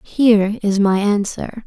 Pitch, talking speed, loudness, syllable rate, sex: 210 Hz, 145 wpm, -16 LUFS, 3.9 syllables/s, female